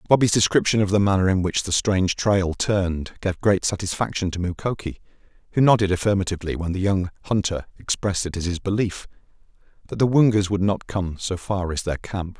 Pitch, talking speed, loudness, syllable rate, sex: 95 Hz, 190 wpm, -22 LUFS, 5.8 syllables/s, male